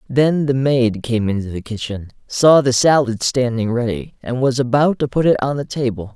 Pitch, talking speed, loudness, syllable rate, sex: 125 Hz, 205 wpm, -17 LUFS, 4.8 syllables/s, male